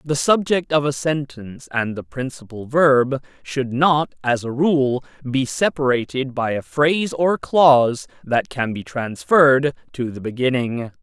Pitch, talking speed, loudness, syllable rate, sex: 135 Hz, 150 wpm, -19 LUFS, 4.2 syllables/s, male